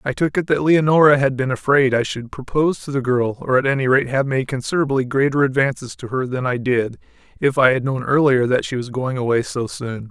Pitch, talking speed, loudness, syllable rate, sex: 130 Hz, 240 wpm, -19 LUFS, 5.7 syllables/s, male